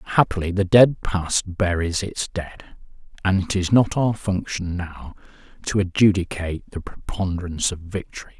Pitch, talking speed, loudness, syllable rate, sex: 95 Hz, 145 wpm, -22 LUFS, 4.7 syllables/s, male